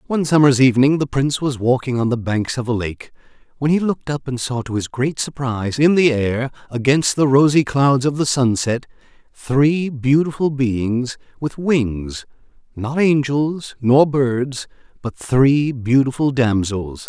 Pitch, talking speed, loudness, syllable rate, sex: 130 Hz, 155 wpm, -18 LUFS, 4.4 syllables/s, male